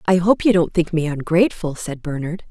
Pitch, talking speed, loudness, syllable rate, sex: 170 Hz, 215 wpm, -19 LUFS, 5.5 syllables/s, female